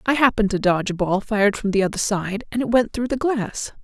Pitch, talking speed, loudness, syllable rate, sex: 215 Hz, 265 wpm, -21 LUFS, 6.2 syllables/s, female